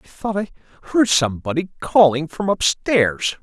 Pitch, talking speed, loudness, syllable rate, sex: 175 Hz, 140 wpm, -19 LUFS, 4.8 syllables/s, male